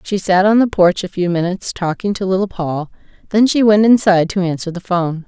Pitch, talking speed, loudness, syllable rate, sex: 190 Hz, 230 wpm, -15 LUFS, 5.9 syllables/s, female